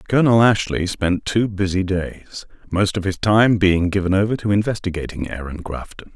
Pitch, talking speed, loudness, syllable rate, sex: 95 Hz, 165 wpm, -19 LUFS, 5.0 syllables/s, male